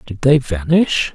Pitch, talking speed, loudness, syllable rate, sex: 130 Hz, 160 wpm, -15 LUFS, 3.9 syllables/s, male